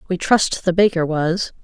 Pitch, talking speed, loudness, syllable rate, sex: 175 Hz, 185 wpm, -18 LUFS, 4.4 syllables/s, female